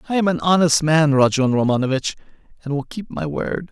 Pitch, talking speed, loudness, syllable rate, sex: 150 Hz, 195 wpm, -19 LUFS, 5.7 syllables/s, male